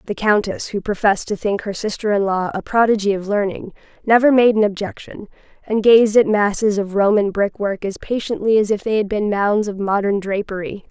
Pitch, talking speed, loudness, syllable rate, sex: 205 Hz, 200 wpm, -18 LUFS, 5.4 syllables/s, female